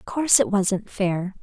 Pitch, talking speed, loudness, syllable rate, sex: 205 Hz, 210 wpm, -21 LUFS, 4.4 syllables/s, female